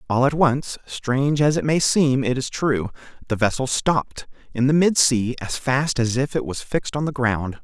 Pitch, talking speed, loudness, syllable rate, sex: 130 Hz, 205 wpm, -21 LUFS, 4.7 syllables/s, male